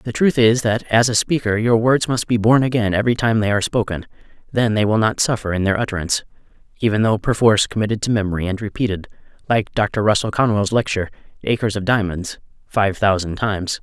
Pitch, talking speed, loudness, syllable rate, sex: 110 Hz, 195 wpm, -18 LUFS, 6.1 syllables/s, male